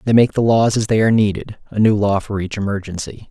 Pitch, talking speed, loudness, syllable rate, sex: 105 Hz, 255 wpm, -17 LUFS, 6.2 syllables/s, male